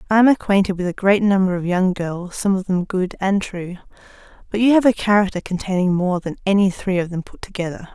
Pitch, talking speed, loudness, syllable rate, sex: 190 Hz, 225 wpm, -19 LUFS, 5.9 syllables/s, female